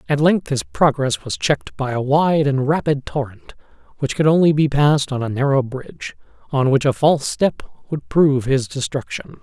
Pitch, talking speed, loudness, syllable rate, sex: 140 Hz, 190 wpm, -18 LUFS, 5.0 syllables/s, male